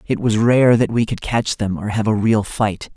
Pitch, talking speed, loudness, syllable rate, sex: 110 Hz, 265 wpm, -18 LUFS, 4.6 syllables/s, male